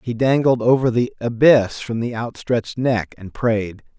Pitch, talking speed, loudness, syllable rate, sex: 120 Hz, 165 wpm, -19 LUFS, 4.4 syllables/s, male